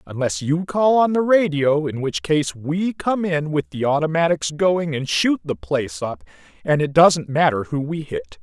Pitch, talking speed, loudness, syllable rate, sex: 155 Hz, 200 wpm, -20 LUFS, 4.5 syllables/s, male